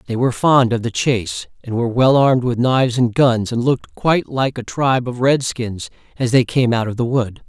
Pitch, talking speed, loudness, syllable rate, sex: 125 Hz, 240 wpm, -17 LUFS, 5.5 syllables/s, male